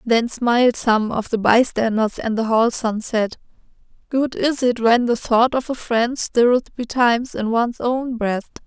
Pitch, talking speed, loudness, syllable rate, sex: 235 Hz, 180 wpm, -19 LUFS, 4.3 syllables/s, female